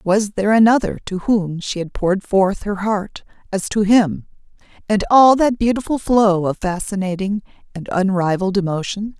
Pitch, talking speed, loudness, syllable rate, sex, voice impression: 200 Hz, 155 wpm, -17 LUFS, 4.8 syllables/s, female, very feminine, very adult-like, very middle-aged, thin, tensed, slightly powerful, bright, hard, clear, fluent, slightly cute, cool, intellectual, refreshing, very sincere, calm, very friendly, very reassuring, unique, very elegant, slightly wild, sweet, slightly lively, strict, sharp